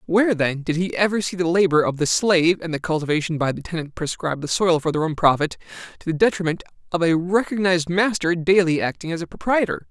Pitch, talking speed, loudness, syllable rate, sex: 170 Hz, 220 wpm, -21 LUFS, 6.3 syllables/s, male